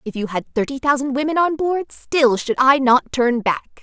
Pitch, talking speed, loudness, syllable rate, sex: 265 Hz, 220 wpm, -18 LUFS, 4.7 syllables/s, female